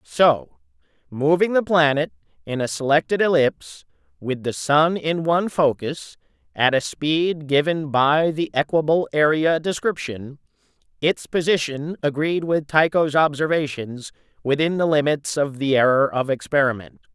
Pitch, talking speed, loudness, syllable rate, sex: 150 Hz, 130 wpm, -20 LUFS, 4.5 syllables/s, male